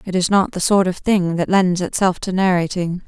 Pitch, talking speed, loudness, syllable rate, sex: 185 Hz, 235 wpm, -18 LUFS, 5.1 syllables/s, female